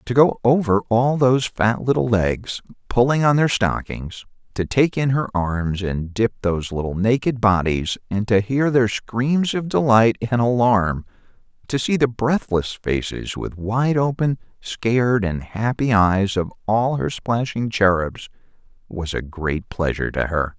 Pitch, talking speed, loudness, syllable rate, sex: 110 Hz, 160 wpm, -20 LUFS, 4.2 syllables/s, male